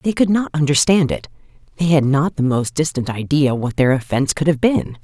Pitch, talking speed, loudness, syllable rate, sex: 145 Hz, 215 wpm, -17 LUFS, 5.4 syllables/s, female